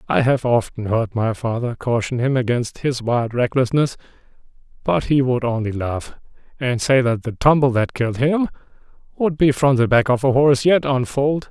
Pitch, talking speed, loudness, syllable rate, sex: 125 Hz, 180 wpm, -19 LUFS, 5.0 syllables/s, male